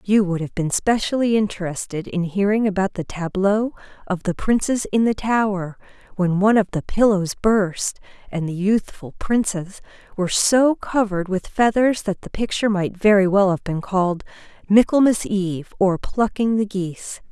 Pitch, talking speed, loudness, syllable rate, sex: 200 Hz, 165 wpm, -20 LUFS, 4.9 syllables/s, female